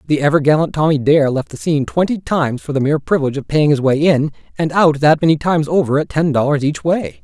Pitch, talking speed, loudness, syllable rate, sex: 145 Hz, 250 wpm, -15 LUFS, 6.5 syllables/s, male